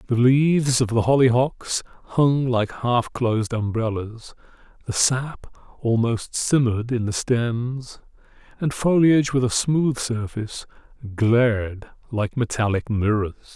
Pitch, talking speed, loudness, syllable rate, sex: 120 Hz, 120 wpm, -21 LUFS, 4.0 syllables/s, male